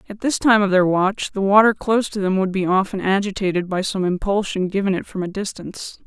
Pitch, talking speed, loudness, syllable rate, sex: 195 Hz, 225 wpm, -19 LUFS, 5.8 syllables/s, female